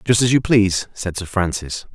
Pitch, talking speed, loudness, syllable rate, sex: 100 Hz, 215 wpm, -19 LUFS, 5.1 syllables/s, male